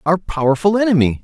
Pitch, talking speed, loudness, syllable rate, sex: 160 Hz, 145 wpm, -16 LUFS, 6.3 syllables/s, male